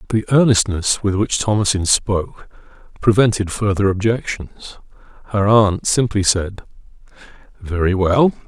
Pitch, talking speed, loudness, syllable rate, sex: 100 Hz, 105 wpm, -17 LUFS, 4.5 syllables/s, male